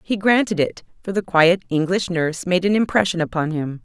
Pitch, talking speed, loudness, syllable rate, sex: 175 Hz, 205 wpm, -19 LUFS, 5.5 syllables/s, female